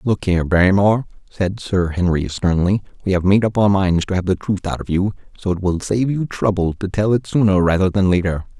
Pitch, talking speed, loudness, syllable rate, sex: 95 Hz, 230 wpm, -18 LUFS, 5.6 syllables/s, male